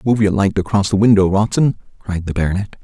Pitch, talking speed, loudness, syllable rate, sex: 100 Hz, 210 wpm, -16 LUFS, 6.1 syllables/s, male